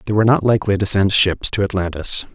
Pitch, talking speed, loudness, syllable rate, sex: 100 Hz, 230 wpm, -16 LUFS, 6.6 syllables/s, male